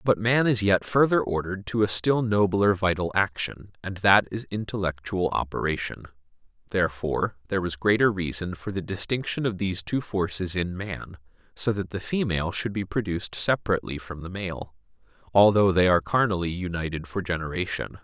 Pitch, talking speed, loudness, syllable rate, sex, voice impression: 95 Hz, 165 wpm, -25 LUFS, 5.5 syllables/s, male, very masculine, adult-like, slightly thick, cool, intellectual, slightly refreshing